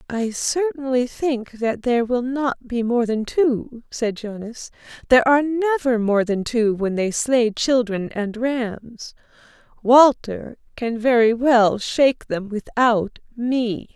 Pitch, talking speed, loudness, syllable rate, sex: 240 Hz, 140 wpm, -20 LUFS, 3.7 syllables/s, female